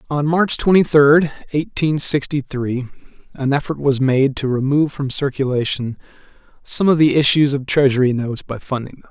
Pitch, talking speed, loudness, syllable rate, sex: 140 Hz, 165 wpm, -17 LUFS, 5.2 syllables/s, male